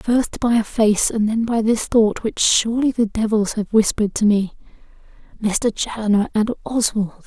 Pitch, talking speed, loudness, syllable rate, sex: 220 Hz, 175 wpm, -19 LUFS, 4.8 syllables/s, female